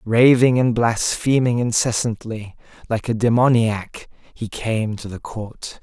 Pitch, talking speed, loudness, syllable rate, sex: 115 Hz, 125 wpm, -19 LUFS, 3.8 syllables/s, male